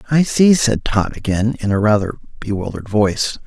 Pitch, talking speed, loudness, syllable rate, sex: 115 Hz, 175 wpm, -17 LUFS, 5.5 syllables/s, male